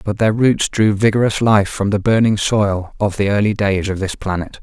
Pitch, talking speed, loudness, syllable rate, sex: 105 Hz, 220 wpm, -16 LUFS, 4.9 syllables/s, male